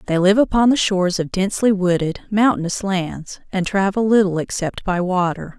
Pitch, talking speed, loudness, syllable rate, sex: 190 Hz, 170 wpm, -18 LUFS, 5.2 syllables/s, female